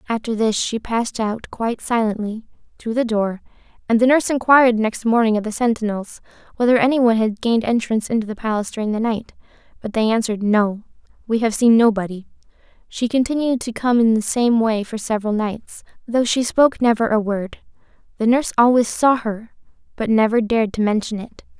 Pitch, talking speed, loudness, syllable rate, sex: 225 Hz, 185 wpm, -19 LUFS, 5.9 syllables/s, female